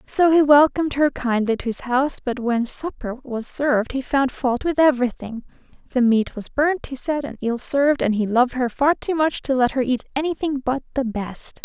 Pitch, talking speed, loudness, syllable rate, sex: 260 Hz, 210 wpm, -21 LUFS, 5.2 syllables/s, female